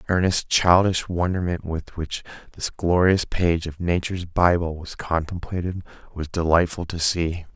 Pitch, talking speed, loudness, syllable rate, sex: 85 Hz, 145 wpm, -23 LUFS, 4.6 syllables/s, male